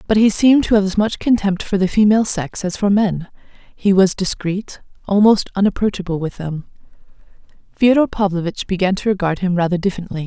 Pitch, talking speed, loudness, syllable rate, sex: 195 Hz, 175 wpm, -17 LUFS, 5.9 syllables/s, female